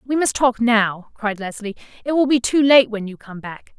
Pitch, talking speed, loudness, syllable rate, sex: 230 Hz, 240 wpm, -18 LUFS, 4.7 syllables/s, female